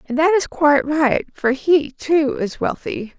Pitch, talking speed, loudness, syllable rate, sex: 295 Hz, 190 wpm, -18 LUFS, 4.0 syllables/s, female